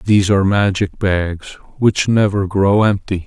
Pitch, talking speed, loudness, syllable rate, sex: 100 Hz, 145 wpm, -15 LUFS, 4.3 syllables/s, male